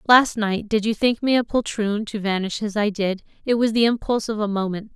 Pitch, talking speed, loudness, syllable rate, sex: 215 Hz, 240 wpm, -22 LUFS, 5.4 syllables/s, female